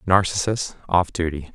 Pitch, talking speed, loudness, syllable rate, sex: 90 Hz, 115 wpm, -22 LUFS, 4.6 syllables/s, male